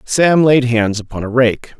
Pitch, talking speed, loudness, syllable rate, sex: 125 Hz, 200 wpm, -14 LUFS, 4.2 syllables/s, male